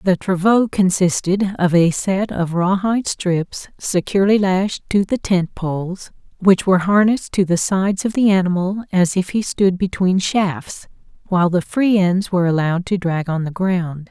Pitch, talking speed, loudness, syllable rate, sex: 185 Hz, 175 wpm, -17 LUFS, 4.7 syllables/s, female